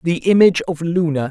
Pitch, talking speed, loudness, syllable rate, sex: 165 Hz, 185 wpm, -16 LUFS, 5.9 syllables/s, male